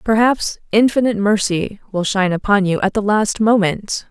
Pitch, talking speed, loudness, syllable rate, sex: 205 Hz, 160 wpm, -16 LUFS, 5.1 syllables/s, female